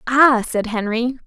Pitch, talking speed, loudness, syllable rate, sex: 240 Hz, 140 wpm, -18 LUFS, 3.8 syllables/s, female